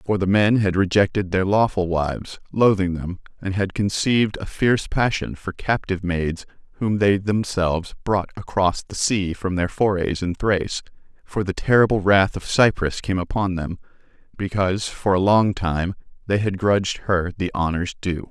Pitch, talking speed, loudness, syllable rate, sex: 95 Hz, 170 wpm, -21 LUFS, 4.8 syllables/s, male